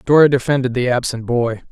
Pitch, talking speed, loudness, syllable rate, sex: 125 Hz, 175 wpm, -16 LUFS, 5.9 syllables/s, male